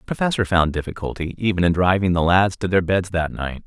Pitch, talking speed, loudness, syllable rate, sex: 90 Hz, 230 wpm, -20 LUFS, 6.2 syllables/s, male